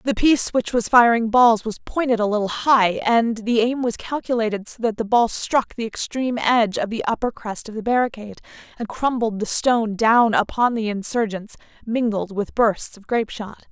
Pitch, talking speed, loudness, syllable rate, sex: 225 Hz, 195 wpm, -20 LUFS, 5.2 syllables/s, female